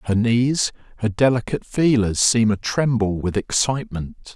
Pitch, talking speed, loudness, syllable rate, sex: 115 Hz, 125 wpm, -20 LUFS, 4.6 syllables/s, male